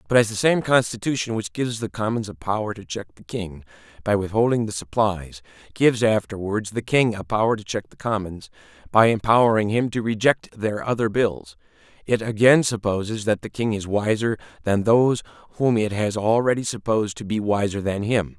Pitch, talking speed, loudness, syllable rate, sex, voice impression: 110 Hz, 185 wpm, -22 LUFS, 5.5 syllables/s, male, very masculine, very adult-like, very thick, slightly tensed, weak, slightly dark, slightly soft, slightly muffled, fluent, cool, slightly intellectual, refreshing, slightly sincere, slightly calm, slightly mature, friendly, reassuring, unique, slightly elegant, wild, slightly sweet, lively, kind, slightly sharp